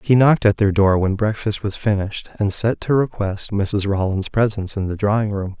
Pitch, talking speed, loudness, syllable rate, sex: 105 Hz, 215 wpm, -19 LUFS, 5.4 syllables/s, male